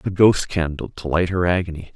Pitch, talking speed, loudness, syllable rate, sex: 90 Hz, 185 wpm, -20 LUFS, 5.3 syllables/s, male